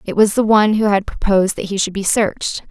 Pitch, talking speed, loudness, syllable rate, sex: 205 Hz, 265 wpm, -16 LUFS, 6.3 syllables/s, female